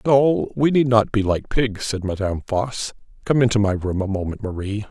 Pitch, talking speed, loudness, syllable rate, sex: 110 Hz, 210 wpm, -21 LUFS, 5.1 syllables/s, male